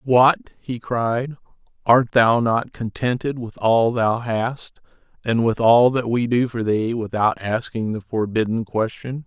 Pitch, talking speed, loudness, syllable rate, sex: 115 Hz, 155 wpm, -20 LUFS, 3.9 syllables/s, male